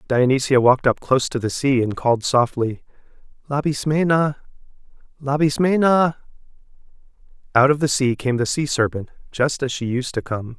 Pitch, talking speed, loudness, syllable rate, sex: 135 Hz, 145 wpm, -19 LUFS, 5.2 syllables/s, male